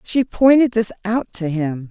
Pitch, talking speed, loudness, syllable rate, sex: 210 Hz, 190 wpm, -18 LUFS, 4.2 syllables/s, female